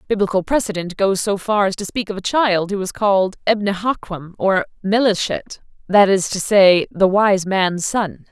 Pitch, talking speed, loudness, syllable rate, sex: 195 Hz, 175 wpm, -17 LUFS, 4.8 syllables/s, female